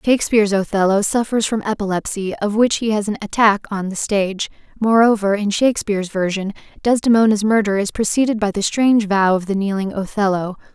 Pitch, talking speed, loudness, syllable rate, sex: 205 Hz, 165 wpm, -18 LUFS, 5.8 syllables/s, female